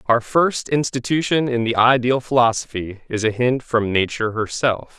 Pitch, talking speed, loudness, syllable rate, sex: 120 Hz, 155 wpm, -19 LUFS, 4.8 syllables/s, male